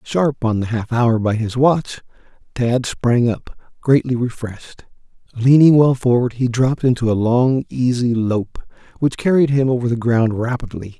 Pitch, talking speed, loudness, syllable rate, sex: 120 Hz, 165 wpm, -17 LUFS, 4.6 syllables/s, male